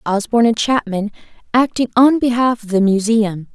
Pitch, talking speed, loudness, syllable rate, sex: 225 Hz, 150 wpm, -16 LUFS, 4.8 syllables/s, female